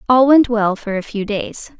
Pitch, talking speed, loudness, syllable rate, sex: 225 Hz, 235 wpm, -16 LUFS, 4.4 syllables/s, female